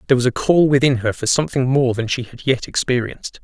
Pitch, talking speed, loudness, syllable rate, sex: 130 Hz, 245 wpm, -18 LUFS, 6.5 syllables/s, male